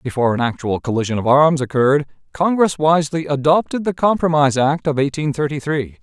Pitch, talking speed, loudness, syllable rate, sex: 145 Hz, 170 wpm, -17 LUFS, 6.0 syllables/s, male